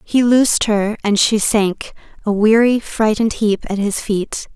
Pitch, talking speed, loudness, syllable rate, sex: 215 Hz, 170 wpm, -16 LUFS, 4.2 syllables/s, female